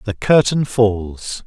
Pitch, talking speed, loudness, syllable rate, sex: 115 Hz, 125 wpm, -16 LUFS, 3.0 syllables/s, male